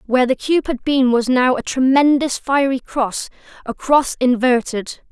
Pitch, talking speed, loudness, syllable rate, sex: 260 Hz, 155 wpm, -17 LUFS, 4.4 syllables/s, female